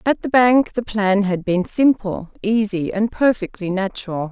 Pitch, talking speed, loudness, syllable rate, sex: 210 Hz, 165 wpm, -19 LUFS, 4.4 syllables/s, female